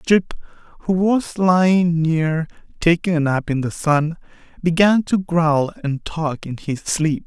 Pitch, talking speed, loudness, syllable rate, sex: 165 Hz, 155 wpm, -19 LUFS, 3.8 syllables/s, male